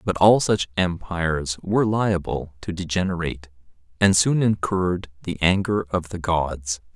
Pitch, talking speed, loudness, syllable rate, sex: 90 Hz, 140 wpm, -22 LUFS, 4.5 syllables/s, male